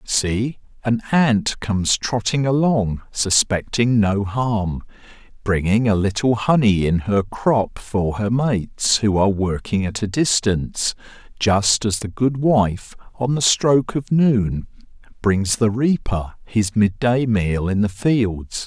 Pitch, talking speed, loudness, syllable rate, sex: 110 Hz, 140 wpm, -19 LUFS, 3.7 syllables/s, male